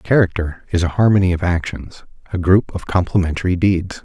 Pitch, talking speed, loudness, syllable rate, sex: 90 Hz, 165 wpm, -18 LUFS, 5.4 syllables/s, male